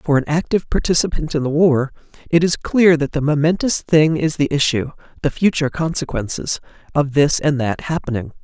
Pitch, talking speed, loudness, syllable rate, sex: 150 Hz, 180 wpm, -18 LUFS, 5.5 syllables/s, male